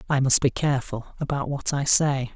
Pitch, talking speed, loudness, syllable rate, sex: 135 Hz, 205 wpm, -22 LUFS, 5.4 syllables/s, male